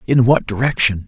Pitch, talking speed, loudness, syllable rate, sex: 120 Hz, 165 wpm, -16 LUFS, 5.5 syllables/s, male